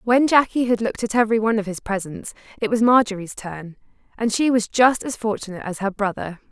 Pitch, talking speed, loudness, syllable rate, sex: 215 Hz, 210 wpm, -20 LUFS, 6.2 syllables/s, female